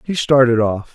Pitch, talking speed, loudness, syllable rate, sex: 125 Hz, 190 wpm, -15 LUFS, 4.7 syllables/s, male